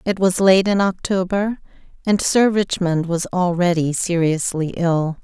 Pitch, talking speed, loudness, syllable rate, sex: 180 Hz, 135 wpm, -18 LUFS, 4.1 syllables/s, female